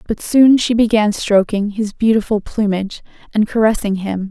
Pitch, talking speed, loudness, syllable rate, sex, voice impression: 210 Hz, 155 wpm, -15 LUFS, 5.2 syllables/s, female, feminine, adult-like, slightly weak, soft, clear, fluent, slightly cute, calm, friendly, reassuring, elegant, kind, modest